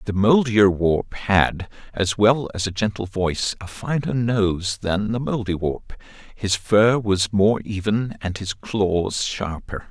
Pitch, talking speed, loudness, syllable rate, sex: 105 Hz, 145 wpm, -21 LUFS, 3.7 syllables/s, male